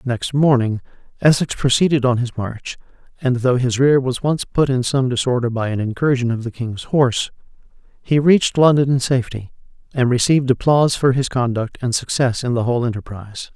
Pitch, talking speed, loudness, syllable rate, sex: 125 Hz, 180 wpm, -18 LUFS, 5.6 syllables/s, male